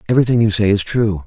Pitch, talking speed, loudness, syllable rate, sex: 110 Hz, 240 wpm, -15 LUFS, 7.4 syllables/s, male